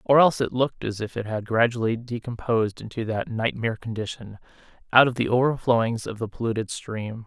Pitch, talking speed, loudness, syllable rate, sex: 115 Hz, 180 wpm, -24 LUFS, 5.9 syllables/s, male